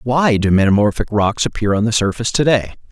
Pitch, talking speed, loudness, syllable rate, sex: 110 Hz, 205 wpm, -16 LUFS, 6.0 syllables/s, male